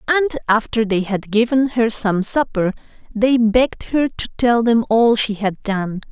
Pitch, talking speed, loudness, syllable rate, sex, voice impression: 225 Hz, 175 wpm, -17 LUFS, 4.2 syllables/s, female, feminine, middle-aged, tensed, powerful, slightly bright, clear, slightly raspy, intellectual, friendly, lively, slightly intense